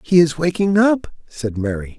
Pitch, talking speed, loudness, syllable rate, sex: 150 Hz, 180 wpm, -18 LUFS, 4.5 syllables/s, male